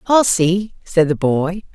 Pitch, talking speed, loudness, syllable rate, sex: 180 Hz, 170 wpm, -17 LUFS, 3.5 syllables/s, female